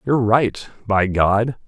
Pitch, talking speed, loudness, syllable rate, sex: 110 Hz, 145 wpm, -18 LUFS, 3.7 syllables/s, male